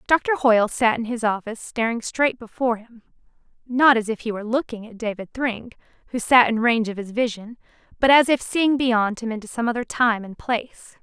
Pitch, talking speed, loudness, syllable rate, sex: 235 Hz, 205 wpm, -21 LUFS, 5.6 syllables/s, female